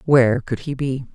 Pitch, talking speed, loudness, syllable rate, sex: 130 Hz, 210 wpm, -20 LUFS, 5.3 syllables/s, female